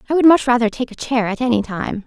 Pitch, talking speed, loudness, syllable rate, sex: 240 Hz, 290 wpm, -17 LUFS, 6.4 syllables/s, female